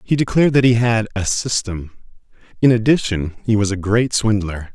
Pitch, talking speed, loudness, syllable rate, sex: 110 Hz, 175 wpm, -17 LUFS, 5.3 syllables/s, male